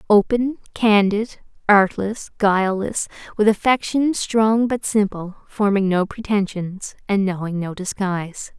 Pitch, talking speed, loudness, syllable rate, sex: 205 Hz, 110 wpm, -20 LUFS, 4.1 syllables/s, female